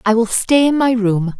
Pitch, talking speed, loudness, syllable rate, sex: 230 Hz, 260 wpm, -15 LUFS, 4.7 syllables/s, female